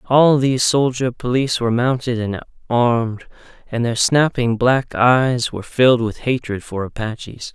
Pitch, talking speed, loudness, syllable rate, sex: 120 Hz, 150 wpm, -18 LUFS, 4.8 syllables/s, male